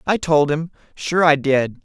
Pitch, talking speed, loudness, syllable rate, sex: 155 Hz, 195 wpm, -18 LUFS, 4.1 syllables/s, male